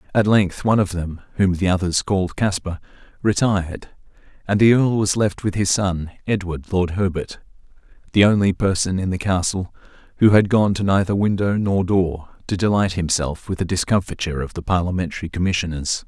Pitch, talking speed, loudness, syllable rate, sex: 95 Hz, 170 wpm, -20 LUFS, 5.4 syllables/s, male